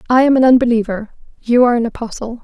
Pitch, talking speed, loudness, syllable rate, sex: 240 Hz, 200 wpm, -14 LUFS, 7.1 syllables/s, female